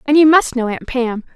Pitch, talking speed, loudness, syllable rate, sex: 265 Hz, 265 wpm, -15 LUFS, 5.4 syllables/s, female